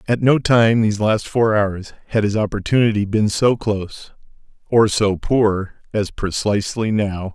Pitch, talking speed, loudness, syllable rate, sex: 105 Hz, 140 wpm, -18 LUFS, 4.4 syllables/s, male